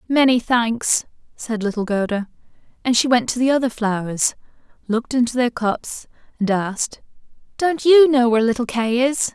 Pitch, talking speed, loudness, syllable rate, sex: 240 Hz, 160 wpm, -19 LUFS, 5.0 syllables/s, female